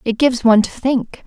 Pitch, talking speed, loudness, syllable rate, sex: 240 Hz, 235 wpm, -16 LUFS, 6.0 syllables/s, female